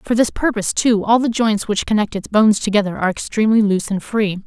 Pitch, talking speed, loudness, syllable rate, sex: 210 Hz, 230 wpm, -17 LUFS, 6.4 syllables/s, female